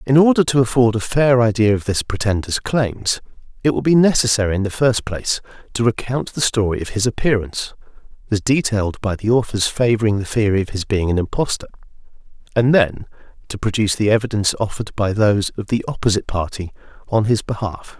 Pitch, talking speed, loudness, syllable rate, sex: 110 Hz, 185 wpm, -18 LUFS, 6.0 syllables/s, male